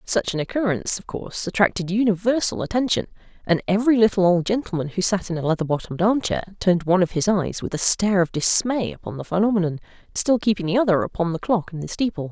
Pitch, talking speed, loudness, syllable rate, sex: 190 Hz, 215 wpm, -21 LUFS, 6.6 syllables/s, female